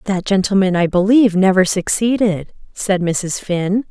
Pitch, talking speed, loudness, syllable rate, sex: 195 Hz, 140 wpm, -16 LUFS, 4.5 syllables/s, female